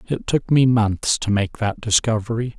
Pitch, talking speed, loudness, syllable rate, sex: 115 Hz, 185 wpm, -19 LUFS, 4.6 syllables/s, male